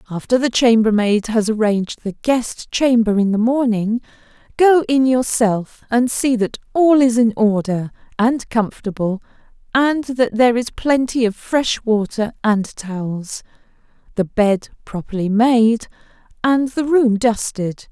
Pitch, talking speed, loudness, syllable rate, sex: 230 Hz, 135 wpm, -17 LUFS, 4.2 syllables/s, female